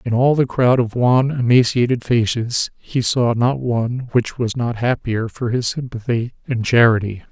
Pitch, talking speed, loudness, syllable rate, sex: 120 Hz, 170 wpm, -18 LUFS, 4.6 syllables/s, male